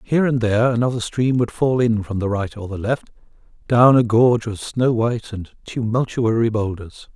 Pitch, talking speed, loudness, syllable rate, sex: 115 Hz, 195 wpm, -19 LUFS, 5.2 syllables/s, male